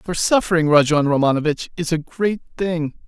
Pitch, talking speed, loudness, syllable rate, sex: 165 Hz, 155 wpm, -19 LUFS, 5.3 syllables/s, male